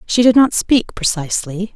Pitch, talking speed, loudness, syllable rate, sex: 210 Hz, 170 wpm, -15 LUFS, 4.9 syllables/s, female